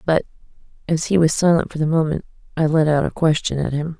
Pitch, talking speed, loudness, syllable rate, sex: 160 Hz, 225 wpm, -19 LUFS, 6.1 syllables/s, female